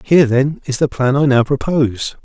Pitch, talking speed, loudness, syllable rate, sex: 135 Hz, 215 wpm, -15 LUFS, 5.3 syllables/s, male